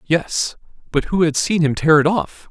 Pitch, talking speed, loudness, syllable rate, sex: 165 Hz, 215 wpm, -18 LUFS, 4.4 syllables/s, male